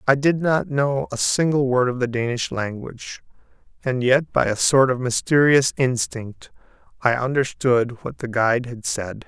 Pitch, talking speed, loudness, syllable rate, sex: 125 Hz, 170 wpm, -20 LUFS, 4.5 syllables/s, male